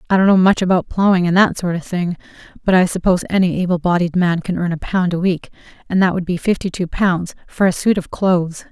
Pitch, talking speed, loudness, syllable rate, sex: 180 Hz, 250 wpm, -17 LUFS, 6.0 syllables/s, female